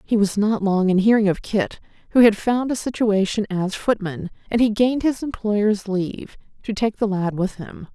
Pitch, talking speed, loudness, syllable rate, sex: 210 Hz, 205 wpm, -20 LUFS, 4.9 syllables/s, female